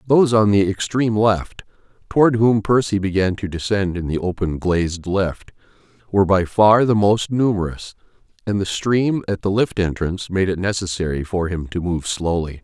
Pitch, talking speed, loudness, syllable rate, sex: 100 Hz, 175 wpm, -19 LUFS, 5.1 syllables/s, male